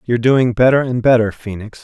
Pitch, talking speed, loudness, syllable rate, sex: 120 Hz, 195 wpm, -14 LUFS, 5.8 syllables/s, male